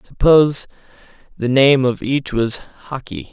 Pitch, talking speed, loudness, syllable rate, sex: 130 Hz, 125 wpm, -16 LUFS, 4.5 syllables/s, male